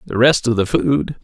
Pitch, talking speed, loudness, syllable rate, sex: 115 Hz, 240 wpm, -16 LUFS, 5.1 syllables/s, male